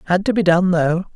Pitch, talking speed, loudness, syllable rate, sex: 180 Hz, 260 wpm, -17 LUFS, 5.7 syllables/s, male